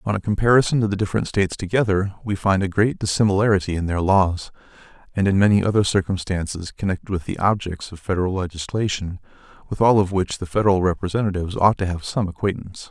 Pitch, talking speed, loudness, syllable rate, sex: 95 Hz, 185 wpm, -21 LUFS, 6.5 syllables/s, male